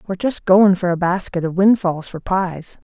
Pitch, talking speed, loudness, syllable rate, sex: 185 Hz, 225 wpm, -17 LUFS, 4.9 syllables/s, female